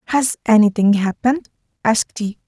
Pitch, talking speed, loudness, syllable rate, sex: 225 Hz, 120 wpm, -17 LUFS, 5.8 syllables/s, female